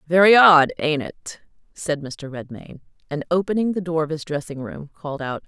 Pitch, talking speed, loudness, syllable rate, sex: 160 Hz, 175 wpm, -20 LUFS, 5.0 syllables/s, female